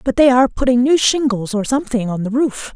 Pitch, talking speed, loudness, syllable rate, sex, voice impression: 245 Hz, 240 wpm, -16 LUFS, 6.0 syllables/s, female, very feminine, young, slightly adult-like, very thin, tensed, slightly powerful, slightly weak, slightly bright, slightly soft, clear, very fluent, slightly raspy, very cute, slightly intellectual, very refreshing, sincere, slightly calm, friendly, reassuring, very unique, elegant, very wild, sweet, lively, slightly kind, very strict, slightly intense, sharp, light